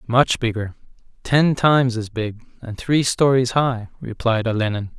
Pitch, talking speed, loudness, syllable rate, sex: 120 Hz, 145 wpm, -19 LUFS, 4.4 syllables/s, male